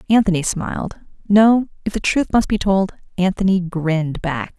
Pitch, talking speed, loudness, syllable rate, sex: 190 Hz, 155 wpm, -18 LUFS, 4.9 syllables/s, female